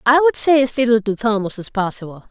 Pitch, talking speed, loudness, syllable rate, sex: 235 Hz, 235 wpm, -17 LUFS, 6.0 syllables/s, female